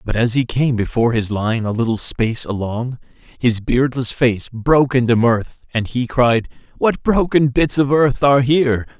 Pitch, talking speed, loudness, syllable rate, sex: 125 Hz, 180 wpm, -17 LUFS, 4.8 syllables/s, male